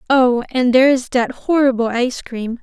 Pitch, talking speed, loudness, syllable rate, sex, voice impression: 250 Hz, 185 wpm, -16 LUFS, 5.2 syllables/s, female, feminine, slightly young, slightly adult-like, thin, slightly dark, slightly soft, clear, fluent, cute, slightly intellectual, refreshing, sincere, slightly calm, slightly friendly, reassuring, slightly unique, wild, slightly sweet, very lively, slightly modest